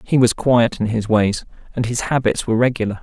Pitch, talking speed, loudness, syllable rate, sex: 115 Hz, 220 wpm, -18 LUFS, 5.7 syllables/s, male